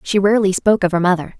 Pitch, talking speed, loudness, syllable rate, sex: 190 Hz, 260 wpm, -16 LUFS, 7.9 syllables/s, female